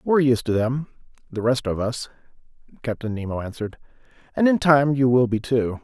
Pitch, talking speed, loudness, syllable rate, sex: 125 Hz, 185 wpm, -22 LUFS, 5.7 syllables/s, male